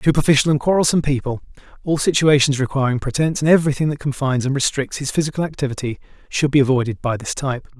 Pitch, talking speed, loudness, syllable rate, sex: 140 Hz, 175 wpm, -19 LUFS, 7.3 syllables/s, male